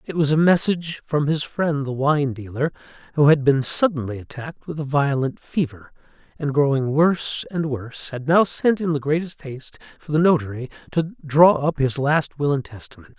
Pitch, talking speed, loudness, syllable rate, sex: 145 Hz, 190 wpm, -21 LUFS, 5.2 syllables/s, male